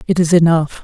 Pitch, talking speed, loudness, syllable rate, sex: 165 Hz, 215 wpm, -13 LUFS, 6.0 syllables/s, female